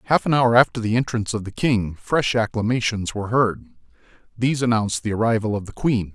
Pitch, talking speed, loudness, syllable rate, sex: 110 Hz, 195 wpm, -21 LUFS, 6.1 syllables/s, male